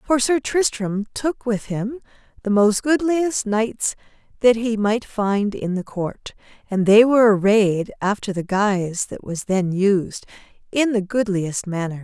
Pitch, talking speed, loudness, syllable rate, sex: 215 Hz, 160 wpm, -20 LUFS, 4.0 syllables/s, female